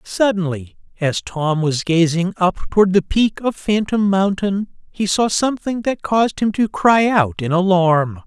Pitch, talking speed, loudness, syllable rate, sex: 190 Hz, 165 wpm, -17 LUFS, 4.3 syllables/s, male